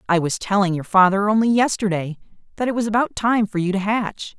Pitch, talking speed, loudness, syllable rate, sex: 205 Hz, 220 wpm, -19 LUFS, 5.8 syllables/s, female